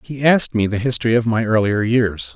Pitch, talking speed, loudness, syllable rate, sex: 115 Hz, 230 wpm, -17 LUFS, 5.8 syllables/s, male